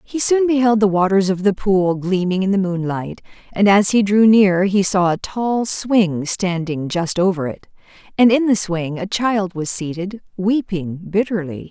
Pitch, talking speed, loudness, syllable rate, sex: 195 Hz, 185 wpm, -17 LUFS, 4.3 syllables/s, female